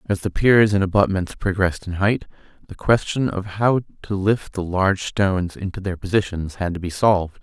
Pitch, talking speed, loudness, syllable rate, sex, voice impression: 95 Hz, 195 wpm, -21 LUFS, 5.3 syllables/s, male, very masculine, slightly old, very thick, very tensed, weak, dark, soft, muffled, fluent, slightly raspy, very cool, intellectual, slightly refreshing, sincere, very calm, very mature, very friendly, very reassuring, unique, elegant, wild, sweet, slightly lively, kind, slightly modest